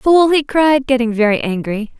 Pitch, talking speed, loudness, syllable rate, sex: 250 Hz, 180 wpm, -14 LUFS, 4.8 syllables/s, female